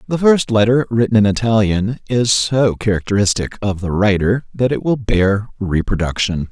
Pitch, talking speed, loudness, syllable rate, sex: 110 Hz, 155 wpm, -16 LUFS, 4.8 syllables/s, male